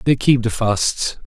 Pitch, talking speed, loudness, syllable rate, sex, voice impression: 120 Hz, 190 wpm, -18 LUFS, 3.7 syllables/s, male, very masculine, very adult-like, slightly old, very thick, tensed, very powerful, bright, slightly hard, slightly muffled, fluent, slightly raspy, cool, intellectual, sincere, very calm, very mature, friendly, very reassuring, unique, slightly elegant, wild, slightly sweet, slightly lively, kind, slightly modest